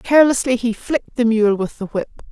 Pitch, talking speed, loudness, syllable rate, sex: 235 Hz, 210 wpm, -18 LUFS, 5.8 syllables/s, female